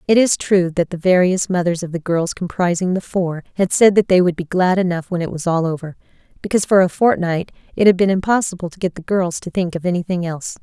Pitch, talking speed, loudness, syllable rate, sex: 180 Hz, 245 wpm, -18 LUFS, 6.0 syllables/s, female